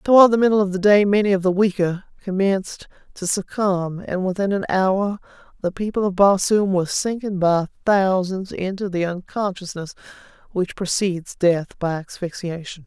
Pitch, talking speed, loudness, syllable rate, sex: 190 Hz, 155 wpm, -20 LUFS, 5.0 syllables/s, female